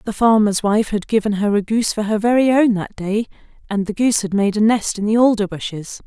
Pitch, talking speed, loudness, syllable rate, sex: 210 Hz, 245 wpm, -17 LUFS, 5.8 syllables/s, female